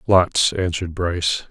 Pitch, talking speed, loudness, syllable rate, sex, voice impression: 85 Hz, 120 wpm, -20 LUFS, 4.5 syllables/s, male, masculine, adult-like, thick, slightly powerful, slightly hard, cool, intellectual, sincere, wild, slightly kind